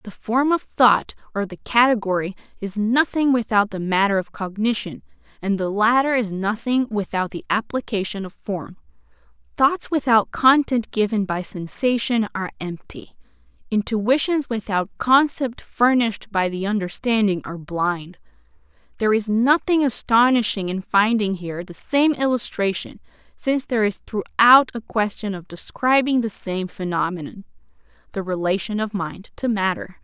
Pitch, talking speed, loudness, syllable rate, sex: 215 Hz, 135 wpm, -21 LUFS, 4.8 syllables/s, female